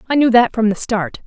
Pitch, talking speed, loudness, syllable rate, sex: 230 Hz, 285 wpm, -15 LUFS, 5.7 syllables/s, female